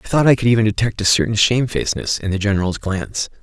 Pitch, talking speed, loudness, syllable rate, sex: 105 Hz, 230 wpm, -17 LUFS, 7.1 syllables/s, male